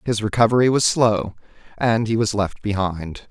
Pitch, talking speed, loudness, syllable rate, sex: 110 Hz, 165 wpm, -19 LUFS, 4.7 syllables/s, male